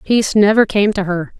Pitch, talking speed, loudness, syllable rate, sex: 200 Hz, 215 wpm, -14 LUFS, 5.6 syllables/s, female